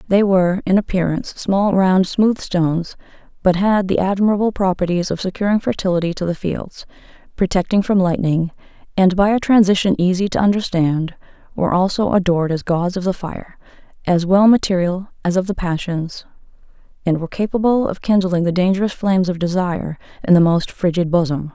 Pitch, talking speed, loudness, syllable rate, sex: 185 Hz, 165 wpm, -17 LUFS, 5.6 syllables/s, female